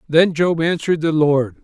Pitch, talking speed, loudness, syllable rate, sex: 160 Hz, 185 wpm, -17 LUFS, 4.9 syllables/s, male